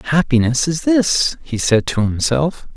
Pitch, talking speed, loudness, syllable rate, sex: 140 Hz, 150 wpm, -16 LUFS, 3.8 syllables/s, male